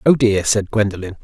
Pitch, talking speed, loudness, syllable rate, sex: 105 Hz, 195 wpm, -17 LUFS, 5.5 syllables/s, male